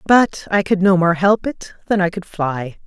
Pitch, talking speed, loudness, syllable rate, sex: 185 Hz, 230 wpm, -17 LUFS, 4.3 syllables/s, female